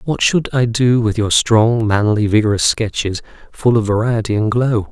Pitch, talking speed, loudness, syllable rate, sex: 110 Hz, 185 wpm, -15 LUFS, 4.7 syllables/s, male